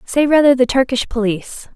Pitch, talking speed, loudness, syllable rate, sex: 255 Hz, 170 wpm, -15 LUFS, 5.6 syllables/s, female